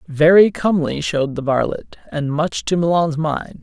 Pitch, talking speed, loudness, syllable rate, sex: 160 Hz, 165 wpm, -17 LUFS, 4.8 syllables/s, male